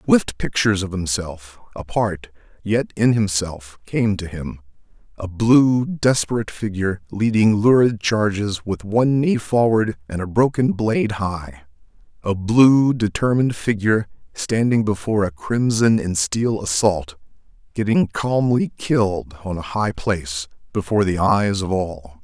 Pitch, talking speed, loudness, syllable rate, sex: 105 Hz, 130 wpm, -19 LUFS, 4.4 syllables/s, male